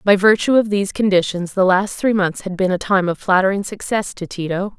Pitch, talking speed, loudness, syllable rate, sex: 195 Hz, 225 wpm, -18 LUFS, 5.6 syllables/s, female